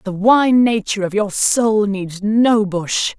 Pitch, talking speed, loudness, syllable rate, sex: 210 Hz, 170 wpm, -16 LUFS, 3.6 syllables/s, female